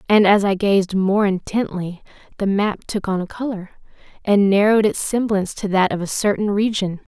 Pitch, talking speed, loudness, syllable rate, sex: 200 Hz, 175 wpm, -19 LUFS, 5.0 syllables/s, female